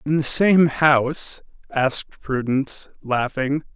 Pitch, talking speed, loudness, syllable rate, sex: 140 Hz, 110 wpm, -20 LUFS, 3.8 syllables/s, male